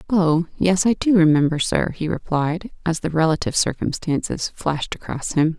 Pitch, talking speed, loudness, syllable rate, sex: 165 Hz, 160 wpm, -20 LUFS, 5.1 syllables/s, female